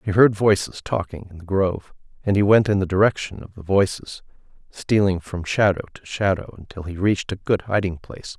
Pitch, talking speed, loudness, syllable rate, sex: 95 Hz, 195 wpm, -21 LUFS, 5.6 syllables/s, male